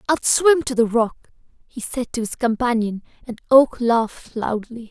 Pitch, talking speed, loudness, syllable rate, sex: 240 Hz, 170 wpm, -19 LUFS, 4.7 syllables/s, female